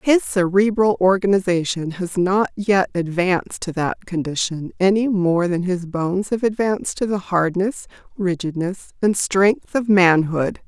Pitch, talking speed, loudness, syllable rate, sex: 185 Hz, 140 wpm, -19 LUFS, 4.4 syllables/s, female